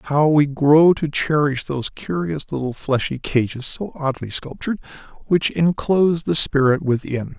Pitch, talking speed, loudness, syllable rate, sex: 140 Hz, 130 wpm, -19 LUFS, 4.6 syllables/s, male